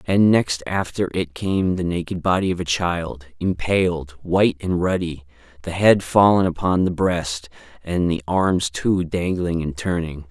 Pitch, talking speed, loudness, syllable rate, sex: 85 Hz, 165 wpm, -21 LUFS, 4.2 syllables/s, male